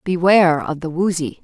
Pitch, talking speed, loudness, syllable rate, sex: 170 Hz, 170 wpm, -17 LUFS, 5.3 syllables/s, female